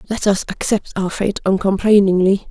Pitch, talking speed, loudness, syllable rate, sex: 195 Hz, 145 wpm, -17 LUFS, 5.0 syllables/s, female